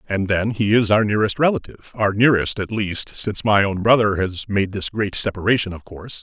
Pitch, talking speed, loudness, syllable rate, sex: 105 Hz, 200 wpm, -19 LUFS, 5.9 syllables/s, male